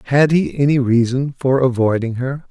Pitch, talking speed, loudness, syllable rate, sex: 130 Hz, 170 wpm, -16 LUFS, 4.8 syllables/s, male